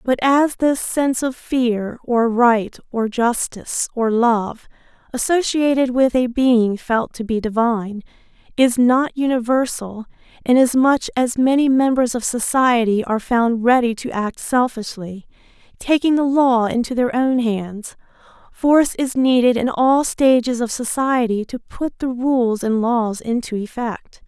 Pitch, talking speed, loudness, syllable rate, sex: 245 Hz, 145 wpm, -18 LUFS, 4.2 syllables/s, female